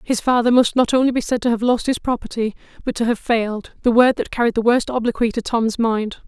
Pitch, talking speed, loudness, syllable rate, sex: 235 Hz, 240 wpm, -19 LUFS, 5.9 syllables/s, female